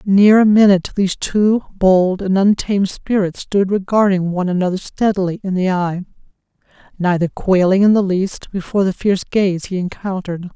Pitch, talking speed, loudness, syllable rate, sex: 190 Hz, 160 wpm, -16 LUFS, 5.3 syllables/s, female